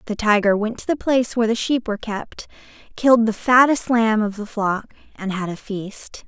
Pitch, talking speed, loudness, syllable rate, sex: 220 Hz, 210 wpm, -19 LUFS, 5.3 syllables/s, female